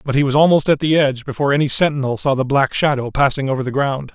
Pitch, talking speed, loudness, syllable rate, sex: 140 Hz, 260 wpm, -16 LUFS, 7.0 syllables/s, male